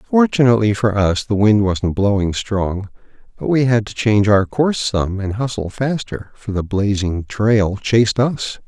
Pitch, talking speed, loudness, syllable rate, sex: 110 Hz, 175 wpm, -17 LUFS, 4.5 syllables/s, male